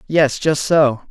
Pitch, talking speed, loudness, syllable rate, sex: 145 Hz, 165 wpm, -16 LUFS, 3.3 syllables/s, male